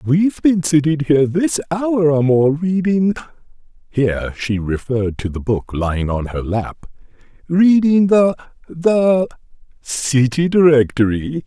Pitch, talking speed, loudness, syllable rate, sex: 150 Hz, 120 wpm, -16 LUFS, 4.1 syllables/s, male